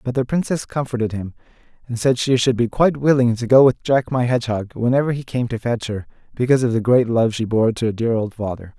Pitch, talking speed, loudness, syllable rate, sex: 120 Hz, 245 wpm, -19 LUFS, 6.1 syllables/s, male